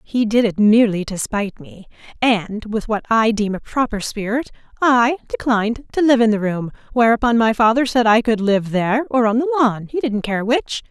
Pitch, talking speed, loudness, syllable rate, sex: 225 Hz, 210 wpm, -18 LUFS, 5.2 syllables/s, female